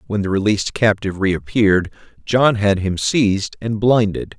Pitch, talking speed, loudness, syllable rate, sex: 105 Hz, 150 wpm, -17 LUFS, 5.0 syllables/s, male